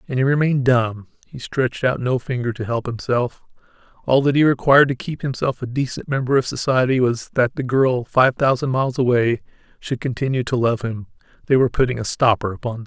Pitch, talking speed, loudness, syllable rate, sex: 125 Hz, 205 wpm, -19 LUFS, 5.8 syllables/s, male